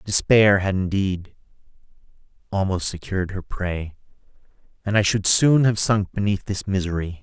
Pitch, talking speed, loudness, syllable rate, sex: 95 Hz, 135 wpm, -21 LUFS, 4.7 syllables/s, male